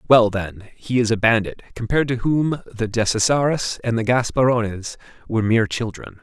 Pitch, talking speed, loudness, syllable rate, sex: 115 Hz, 165 wpm, -20 LUFS, 5.3 syllables/s, male